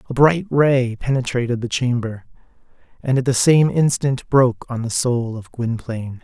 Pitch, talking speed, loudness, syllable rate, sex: 125 Hz, 165 wpm, -19 LUFS, 4.8 syllables/s, male